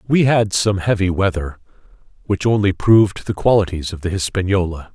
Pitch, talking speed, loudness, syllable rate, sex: 95 Hz, 160 wpm, -17 LUFS, 5.4 syllables/s, male